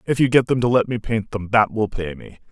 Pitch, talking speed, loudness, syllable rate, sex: 110 Hz, 310 wpm, -20 LUFS, 6.1 syllables/s, male